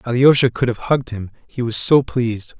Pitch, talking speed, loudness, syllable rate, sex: 120 Hz, 210 wpm, -17 LUFS, 5.6 syllables/s, male